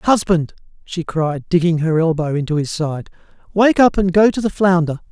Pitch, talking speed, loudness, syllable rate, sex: 175 Hz, 190 wpm, -17 LUFS, 4.9 syllables/s, male